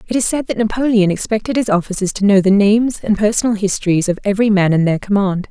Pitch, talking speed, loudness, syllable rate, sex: 205 Hz, 230 wpm, -15 LUFS, 6.7 syllables/s, female